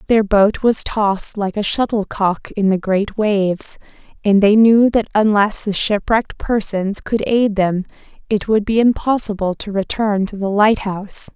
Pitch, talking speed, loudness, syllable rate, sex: 205 Hz, 165 wpm, -17 LUFS, 4.4 syllables/s, female